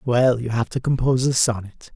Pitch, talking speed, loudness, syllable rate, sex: 120 Hz, 215 wpm, -20 LUFS, 5.5 syllables/s, male